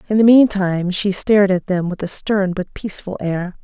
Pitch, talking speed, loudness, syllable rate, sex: 195 Hz, 215 wpm, -17 LUFS, 5.3 syllables/s, female